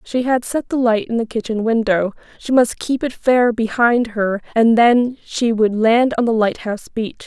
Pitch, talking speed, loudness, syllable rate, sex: 230 Hz, 205 wpm, -17 LUFS, 4.5 syllables/s, female